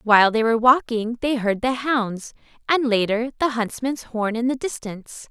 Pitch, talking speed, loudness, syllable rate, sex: 235 Hz, 180 wpm, -21 LUFS, 4.9 syllables/s, female